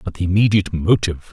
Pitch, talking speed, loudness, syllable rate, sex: 95 Hz, 180 wpm, -17 LUFS, 7.4 syllables/s, male